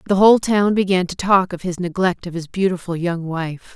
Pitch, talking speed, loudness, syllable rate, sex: 180 Hz, 225 wpm, -19 LUFS, 5.4 syllables/s, female